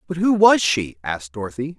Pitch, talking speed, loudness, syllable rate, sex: 145 Hz, 200 wpm, -19 LUFS, 5.8 syllables/s, male